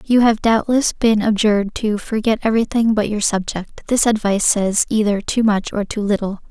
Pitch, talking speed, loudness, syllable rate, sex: 215 Hz, 185 wpm, -17 LUFS, 5.2 syllables/s, female